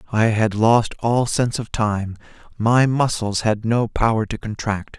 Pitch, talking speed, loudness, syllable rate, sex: 110 Hz, 170 wpm, -20 LUFS, 4.2 syllables/s, male